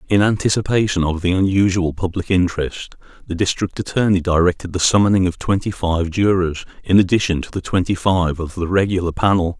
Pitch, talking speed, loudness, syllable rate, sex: 90 Hz, 170 wpm, -18 LUFS, 5.8 syllables/s, male